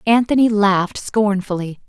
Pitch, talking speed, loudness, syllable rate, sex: 205 Hz, 95 wpm, -17 LUFS, 4.7 syllables/s, female